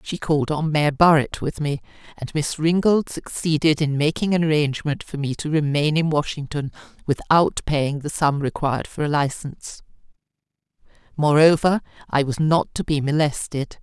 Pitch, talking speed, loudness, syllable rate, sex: 150 Hz, 155 wpm, -21 LUFS, 5.0 syllables/s, female